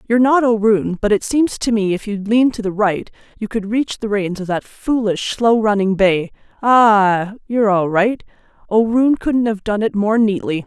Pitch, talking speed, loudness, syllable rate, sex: 215 Hz, 195 wpm, -16 LUFS, 4.6 syllables/s, female